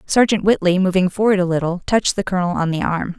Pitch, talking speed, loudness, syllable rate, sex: 185 Hz, 225 wpm, -18 LUFS, 6.6 syllables/s, female